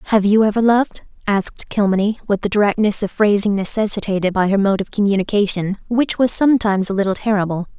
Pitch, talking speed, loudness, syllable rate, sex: 205 Hz, 175 wpm, -17 LUFS, 6.4 syllables/s, female